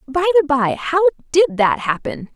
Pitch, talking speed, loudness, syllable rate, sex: 295 Hz, 180 wpm, -17 LUFS, 4.1 syllables/s, female